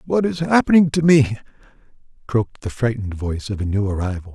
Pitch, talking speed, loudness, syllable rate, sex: 125 Hz, 180 wpm, -19 LUFS, 6.4 syllables/s, male